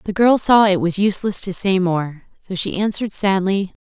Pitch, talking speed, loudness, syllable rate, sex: 195 Hz, 205 wpm, -18 LUFS, 5.3 syllables/s, female